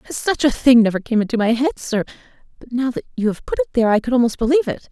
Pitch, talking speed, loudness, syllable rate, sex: 240 Hz, 270 wpm, -18 LUFS, 7.3 syllables/s, female